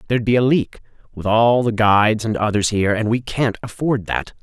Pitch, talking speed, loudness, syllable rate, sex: 115 Hz, 215 wpm, -18 LUFS, 5.5 syllables/s, male